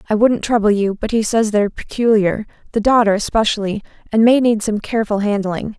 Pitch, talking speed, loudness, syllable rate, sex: 215 Hz, 165 wpm, -16 LUFS, 5.7 syllables/s, female